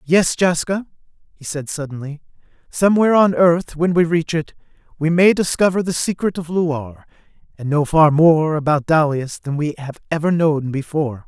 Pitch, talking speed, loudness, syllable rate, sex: 160 Hz, 160 wpm, -17 LUFS, 5.0 syllables/s, male